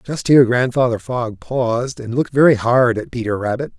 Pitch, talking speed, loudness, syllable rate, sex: 120 Hz, 190 wpm, -17 LUFS, 5.5 syllables/s, male